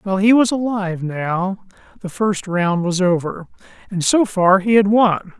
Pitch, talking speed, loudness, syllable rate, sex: 195 Hz, 180 wpm, -17 LUFS, 4.2 syllables/s, male